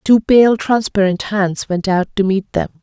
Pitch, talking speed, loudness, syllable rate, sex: 200 Hz, 190 wpm, -15 LUFS, 4.2 syllables/s, female